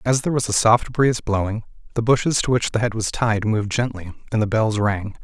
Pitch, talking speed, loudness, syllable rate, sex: 110 Hz, 240 wpm, -20 LUFS, 5.7 syllables/s, male